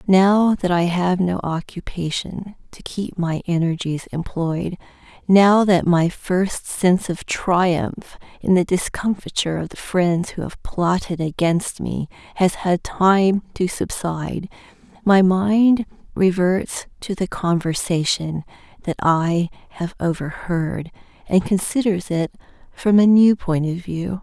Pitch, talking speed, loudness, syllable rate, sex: 180 Hz, 130 wpm, -20 LUFS, 3.8 syllables/s, female